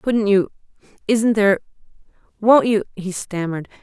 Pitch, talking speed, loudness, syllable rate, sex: 205 Hz, 95 wpm, -19 LUFS, 5.1 syllables/s, female